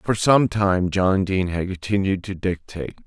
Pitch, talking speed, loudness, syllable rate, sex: 95 Hz, 175 wpm, -21 LUFS, 4.8 syllables/s, male